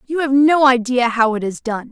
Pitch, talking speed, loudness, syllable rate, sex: 250 Hz, 250 wpm, -15 LUFS, 5.0 syllables/s, female